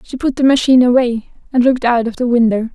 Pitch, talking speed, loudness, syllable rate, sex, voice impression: 245 Hz, 240 wpm, -14 LUFS, 6.6 syllables/s, female, feminine, adult-like, relaxed, weak, soft, slightly muffled, cute, refreshing, calm, friendly, reassuring, elegant, kind, modest